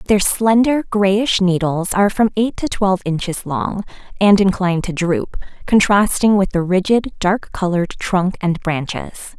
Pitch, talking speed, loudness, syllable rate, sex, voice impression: 195 Hz, 155 wpm, -17 LUFS, 4.4 syllables/s, female, very feminine, slightly young, slightly adult-like, thin, very tensed, powerful, very bright, hard, very clear, very fluent, cute, slightly cool, intellectual, very refreshing, sincere, calm, very friendly, reassuring, very unique, elegant, wild, sweet, very lively, strict, intense, slightly sharp, light